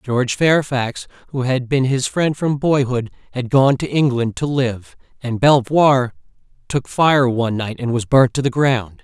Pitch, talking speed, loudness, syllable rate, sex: 130 Hz, 195 wpm, -17 LUFS, 4.3 syllables/s, male